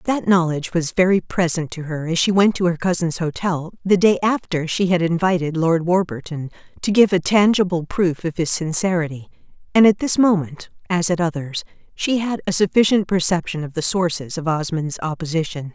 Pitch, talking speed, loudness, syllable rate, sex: 175 Hz, 185 wpm, -19 LUFS, 5.3 syllables/s, female